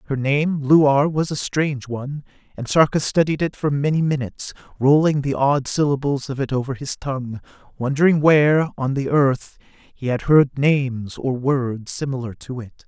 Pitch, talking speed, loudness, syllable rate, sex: 140 Hz, 170 wpm, -20 LUFS, 4.9 syllables/s, male